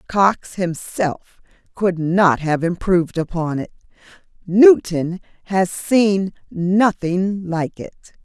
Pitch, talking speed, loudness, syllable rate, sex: 185 Hz, 100 wpm, -18 LUFS, 3.2 syllables/s, female